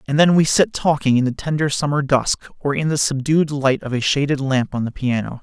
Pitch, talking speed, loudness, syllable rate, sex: 140 Hz, 245 wpm, -18 LUFS, 5.4 syllables/s, male